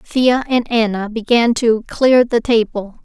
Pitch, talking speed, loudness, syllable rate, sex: 230 Hz, 160 wpm, -15 LUFS, 3.9 syllables/s, female